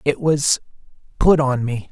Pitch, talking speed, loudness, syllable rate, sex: 140 Hz, 125 wpm, -18 LUFS, 4.0 syllables/s, male